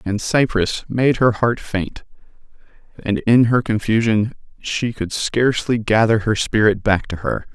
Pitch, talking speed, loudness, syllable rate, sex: 110 Hz, 150 wpm, -18 LUFS, 4.2 syllables/s, male